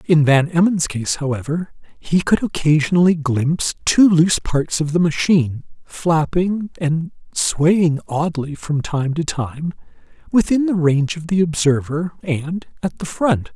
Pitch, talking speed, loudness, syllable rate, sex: 160 Hz, 145 wpm, -18 LUFS, 4.2 syllables/s, male